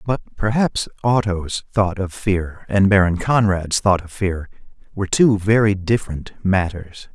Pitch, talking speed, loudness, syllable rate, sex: 100 Hz, 145 wpm, -19 LUFS, 4.2 syllables/s, male